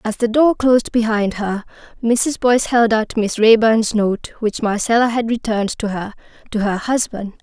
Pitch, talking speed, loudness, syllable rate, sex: 225 Hz, 180 wpm, -17 LUFS, 4.9 syllables/s, female